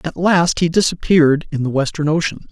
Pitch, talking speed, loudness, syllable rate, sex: 160 Hz, 190 wpm, -16 LUFS, 5.7 syllables/s, male